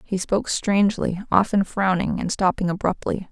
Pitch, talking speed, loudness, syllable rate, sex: 195 Hz, 145 wpm, -22 LUFS, 5.1 syllables/s, female